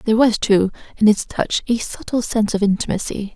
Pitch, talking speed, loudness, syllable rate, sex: 215 Hz, 195 wpm, -19 LUFS, 5.8 syllables/s, female